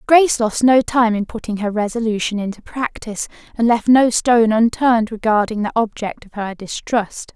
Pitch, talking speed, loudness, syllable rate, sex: 225 Hz, 170 wpm, -17 LUFS, 5.2 syllables/s, female